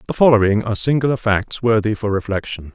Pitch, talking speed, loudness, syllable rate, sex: 110 Hz, 175 wpm, -17 LUFS, 6.2 syllables/s, male